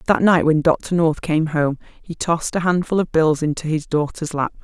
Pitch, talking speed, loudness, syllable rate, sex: 160 Hz, 220 wpm, -19 LUFS, 4.9 syllables/s, female